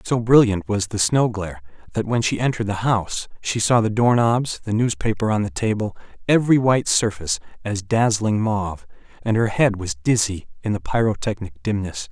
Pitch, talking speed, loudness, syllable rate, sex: 105 Hz, 185 wpm, -21 LUFS, 5.4 syllables/s, male